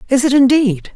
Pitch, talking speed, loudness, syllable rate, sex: 255 Hz, 190 wpm, -13 LUFS, 5.3 syllables/s, female